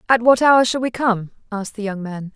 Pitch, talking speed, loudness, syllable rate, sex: 225 Hz, 255 wpm, -18 LUFS, 5.6 syllables/s, female